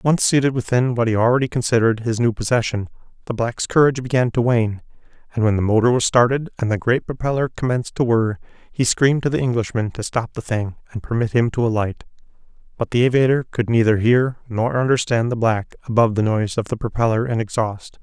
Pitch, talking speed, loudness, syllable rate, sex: 115 Hz, 205 wpm, -19 LUFS, 6.2 syllables/s, male